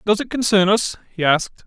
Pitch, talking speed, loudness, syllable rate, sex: 195 Hz, 215 wpm, -18 LUFS, 5.6 syllables/s, male